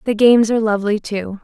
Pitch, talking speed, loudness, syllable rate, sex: 215 Hz, 210 wpm, -16 LUFS, 7.0 syllables/s, female